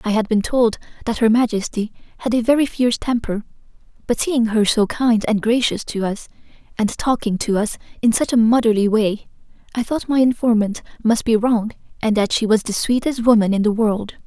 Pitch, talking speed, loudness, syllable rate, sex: 225 Hz, 200 wpm, -18 LUFS, 5.4 syllables/s, female